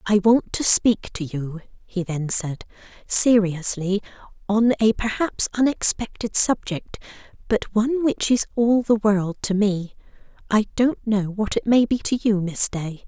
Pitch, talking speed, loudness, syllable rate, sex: 210 Hz, 150 wpm, -21 LUFS, 4.1 syllables/s, female